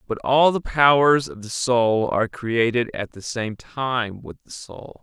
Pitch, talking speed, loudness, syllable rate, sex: 120 Hz, 190 wpm, -21 LUFS, 3.9 syllables/s, male